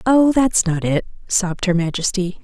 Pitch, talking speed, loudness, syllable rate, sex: 195 Hz, 170 wpm, -18 LUFS, 4.8 syllables/s, female